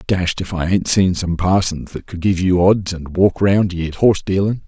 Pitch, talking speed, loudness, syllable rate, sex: 90 Hz, 245 wpm, -17 LUFS, 4.9 syllables/s, male